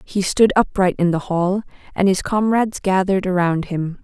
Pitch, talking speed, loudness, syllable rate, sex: 195 Hz, 180 wpm, -18 LUFS, 5.1 syllables/s, female